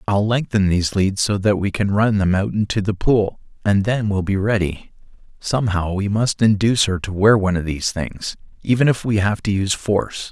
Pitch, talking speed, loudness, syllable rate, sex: 100 Hz, 215 wpm, -19 LUFS, 5.4 syllables/s, male